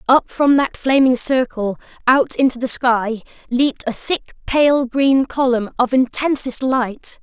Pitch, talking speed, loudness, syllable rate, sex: 255 Hz, 150 wpm, -17 LUFS, 4.2 syllables/s, female